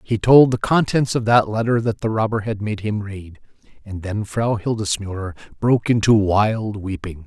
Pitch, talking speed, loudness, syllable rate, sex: 105 Hz, 180 wpm, -19 LUFS, 4.8 syllables/s, male